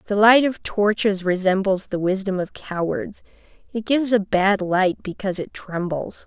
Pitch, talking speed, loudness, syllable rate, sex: 200 Hz, 165 wpm, -21 LUFS, 4.6 syllables/s, female